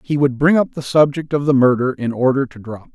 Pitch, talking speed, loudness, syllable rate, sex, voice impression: 135 Hz, 285 wpm, -16 LUFS, 6.0 syllables/s, male, masculine, adult-like, cool, intellectual, slightly sincere, slightly elegant